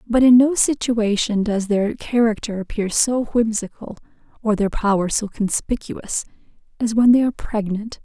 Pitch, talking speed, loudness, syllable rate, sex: 220 Hz, 150 wpm, -19 LUFS, 4.6 syllables/s, female